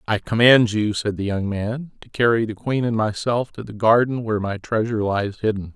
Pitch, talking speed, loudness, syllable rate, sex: 110 Hz, 220 wpm, -20 LUFS, 5.3 syllables/s, male